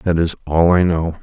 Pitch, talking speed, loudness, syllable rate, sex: 85 Hz, 245 wpm, -16 LUFS, 4.7 syllables/s, male